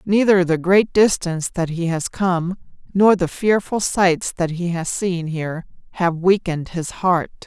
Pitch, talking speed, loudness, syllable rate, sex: 180 Hz, 170 wpm, -19 LUFS, 4.3 syllables/s, female